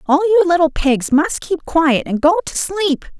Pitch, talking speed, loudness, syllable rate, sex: 325 Hz, 205 wpm, -16 LUFS, 4.4 syllables/s, female